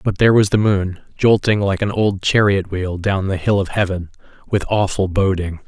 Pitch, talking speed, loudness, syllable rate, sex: 100 Hz, 200 wpm, -17 LUFS, 5.0 syllables/s, male